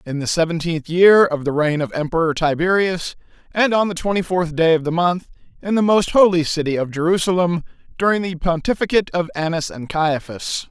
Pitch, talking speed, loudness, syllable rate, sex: 170 Hz, 185 wpm, -18 LUFS, 5.5 syllables/s, male